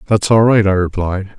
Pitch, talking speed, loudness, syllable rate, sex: 100 Hz, 215 wpm, -14 LUFS, 5.0 syllables/s, male